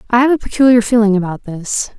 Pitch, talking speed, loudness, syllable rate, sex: 225 Hz, 210 wpm, -14 LUFS, 6.3 syllables/s, female